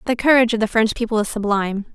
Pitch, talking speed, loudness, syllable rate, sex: 225 Hz, 245 wpm, -18 LUFS, 7.5 syllables/s, female